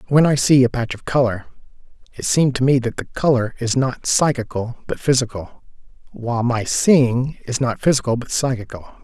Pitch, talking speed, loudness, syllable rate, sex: 125 Hz, 180 wpm, -19 LUFS, 5.3 syllables/s, male